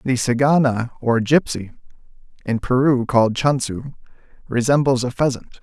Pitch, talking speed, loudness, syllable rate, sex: 125 Hz, 115 wpm, -19 LUFS, 3.8 syllables/s, male